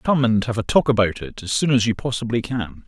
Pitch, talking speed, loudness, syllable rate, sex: 115 Hz, 270 wpm, -20 LUFS, 5.8 syllables/s, male